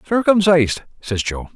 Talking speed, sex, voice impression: 115 wpm, male, very masculine, very adult-like, very middle-aged, thick, very tensed, very powerful, very bright, slightly soft, very clear, very fluent, slightly raspy, cool, intellectual, very refreshing, sincere, slightly calm, mature, friendly, reassuring, very unique, slightly elegant, very wild, sweet, very lively, kind, very intense